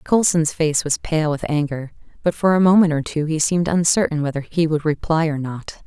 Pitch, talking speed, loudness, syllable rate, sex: 160 Hz, 215 wpm, -19 LUFS, 5.4 syllables/s, female